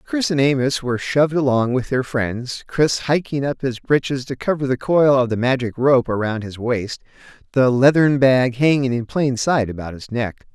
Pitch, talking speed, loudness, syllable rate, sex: 130 Hz, 200 wpm, -19 LUFS, 4.9 syllables/s, male